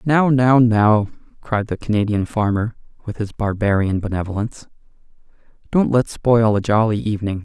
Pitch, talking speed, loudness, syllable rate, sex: 110 Hz, 135 wpm, -18 LUFS, 5.1 syllables/s, male